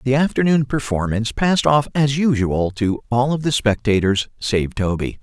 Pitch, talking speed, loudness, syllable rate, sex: 125 Hz, 160 wpm, -19 LUFS, 4.9 syllables/s, male